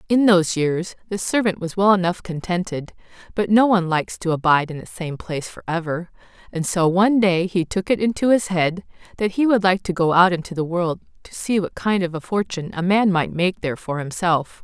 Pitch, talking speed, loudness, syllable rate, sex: 180 Hz, 220 wpm, -20 LUFS, 5.6 syllables/s, female